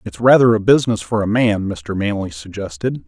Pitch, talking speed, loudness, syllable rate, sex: 105 Hz, 195 wpm, -16 LUFS, 5.4 syllables/s, male